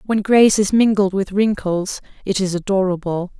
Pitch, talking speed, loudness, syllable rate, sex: 195 Hz, 160 wpm, -17 LUFS, 4.9 syllables/s, female